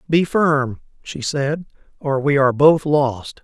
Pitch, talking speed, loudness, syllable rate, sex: 145 Hz, 155 wpm, -18 LUFS, 3.7 syllables/s, male